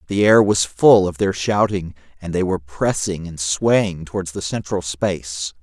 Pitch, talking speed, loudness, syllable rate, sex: 90 Hz, 180 wpm, -19 LUFS, 4.5 syllables/s, male